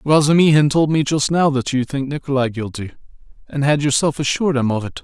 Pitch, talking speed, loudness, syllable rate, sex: 140 Hz, 205 wpm, -17 LUFS, 6.0 syllables/s, male